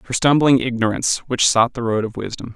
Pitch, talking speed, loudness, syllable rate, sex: 120 Hz, 210 wpm, -18 LUFS, 6.1 syllables/s, male